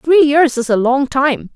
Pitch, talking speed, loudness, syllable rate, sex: 275 Hz, 230 wpm, -13 LUFS, 4.0 syllables/s, female